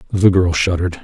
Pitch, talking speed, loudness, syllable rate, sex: 90 Hz, 175 wpm, -15 LUFS, 6.3 syllables/s, male